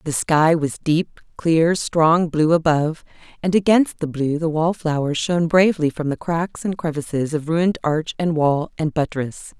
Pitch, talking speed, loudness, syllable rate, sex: 160 Hz, 175 wpm, -20 LUFS, 4.6 syllables/s, female